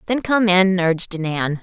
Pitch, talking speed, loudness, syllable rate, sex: 185 Hz, 185 wpm, -18 LUFS, 4.1 syllables/s, female